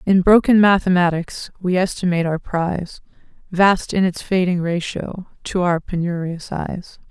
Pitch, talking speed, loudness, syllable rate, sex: 180 Hz, 135 wpm, -18 LUFS, 4.5 syllables/s, female